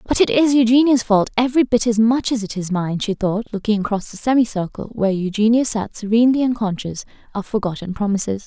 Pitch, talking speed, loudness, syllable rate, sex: 220 Hz, 190 wpm, -18 LUFS, 6.1 syllables/s, female